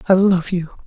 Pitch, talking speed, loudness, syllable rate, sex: 180 Hz, 210 wpm, -18 LUFS, 5.5 syllables/s, female